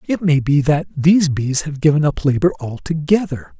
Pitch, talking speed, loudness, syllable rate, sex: 150 Hz, 185 wpm, -17 LUFS, 5.0 syllables/s, male